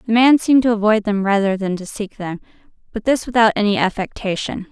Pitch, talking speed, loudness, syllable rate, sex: 215 Hz, 205 wpm, -17 LUFS, 6.0 syllables/s, female